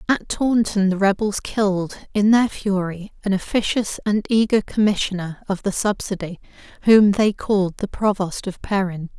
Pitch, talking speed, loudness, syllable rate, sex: 200 Hz, 150 wpm, -20 LUFS, 4.7 syllables/s, female